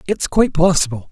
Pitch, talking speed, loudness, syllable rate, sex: 160 Hz, 160 wpm, -16 LUFS, 6.3 syllables/s, male